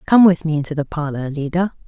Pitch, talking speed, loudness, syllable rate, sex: 160 Hz, 225 wpm, -18 LUFS, 6.6 syllables/s, female